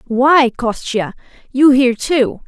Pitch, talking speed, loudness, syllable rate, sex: 255 Hz, 120 wpm, -14 LUFS, 3.7 syllables/s, female